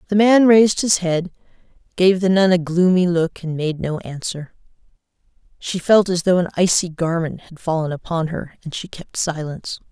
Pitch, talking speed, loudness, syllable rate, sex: 175 Hz, 180 wpm, -18 LUFS, 5.0 syllables/s, female